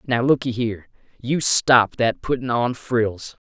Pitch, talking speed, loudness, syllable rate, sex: 120 Hz, 155 wpm, -20 LUFS, 4.0 syllables/s, male